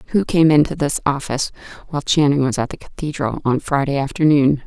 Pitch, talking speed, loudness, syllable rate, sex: 145 Hz, 180 wpm, -18 LUFS, 5.8 syllables/s, female